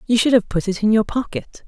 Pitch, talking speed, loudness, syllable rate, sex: 220 Hz, 285 wpm, -18 LUFS, 6.0 syllables/s, female